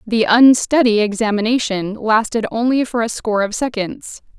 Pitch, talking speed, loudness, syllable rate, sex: 225 Hz, 135 wpm, -16 LUFS, 4.9 syllables/s, female